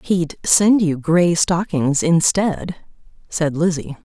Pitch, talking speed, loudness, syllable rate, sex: 170 Hz, 115 wpm, -17 LUFS, 3.2 syllables/s, female